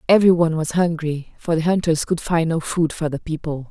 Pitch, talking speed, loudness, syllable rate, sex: 165 Hz, 225 wpm, -20 LUFS, 5.7 syllables/s, female